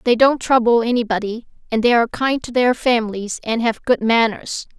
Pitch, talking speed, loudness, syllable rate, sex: 235 Hz, 190 wpm, -18 LUFS, 5.4 syllables/s, female